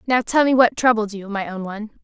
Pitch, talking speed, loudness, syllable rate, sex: 220 Hz, 265 wpm, -19 LUFS, 6.1 syllables/s, female